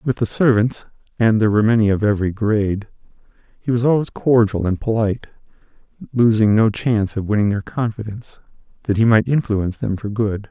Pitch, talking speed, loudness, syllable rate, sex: 110 Hz, 170 wpm, -18 LUFS, 6.0 syllables/s, male